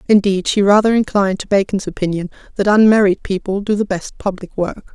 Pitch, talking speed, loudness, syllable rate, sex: 200 Hz, 180 wpm, -16 LUFS, 5.8 syllables/s, female